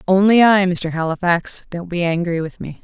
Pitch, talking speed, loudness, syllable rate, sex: 180 Hz, 170 wpm, -17 LUFS, 4.9 syllables/s, female